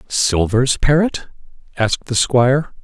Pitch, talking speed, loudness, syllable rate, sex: 130 Hz, 105 wpm, -16 LUFS, 4.3 syllables/s, male